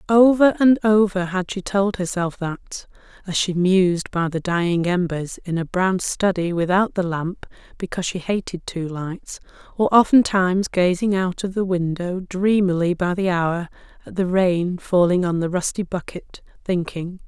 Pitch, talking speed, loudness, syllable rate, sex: 185 Hz, 165 wpm, -20 LUFS, 4.5 syllables/s, female